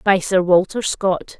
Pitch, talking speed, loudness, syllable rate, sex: 190 Hz, 170 wpm, -17 LUFS, 3.9 syllables/s, female